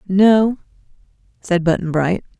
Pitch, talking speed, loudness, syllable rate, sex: 185 Hz, 100 wpm, -17 LUFS, 3.9 syllables/s, female